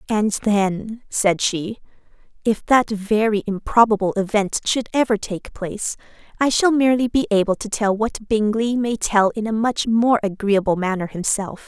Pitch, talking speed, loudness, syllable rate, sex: 215 Hz, 160 wpm, -20 LUFS, 4.6 syllables/s, female